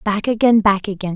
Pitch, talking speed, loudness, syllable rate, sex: 205 Hz, 210 wpm, -16 LUFS, 5.4 syllables/s, female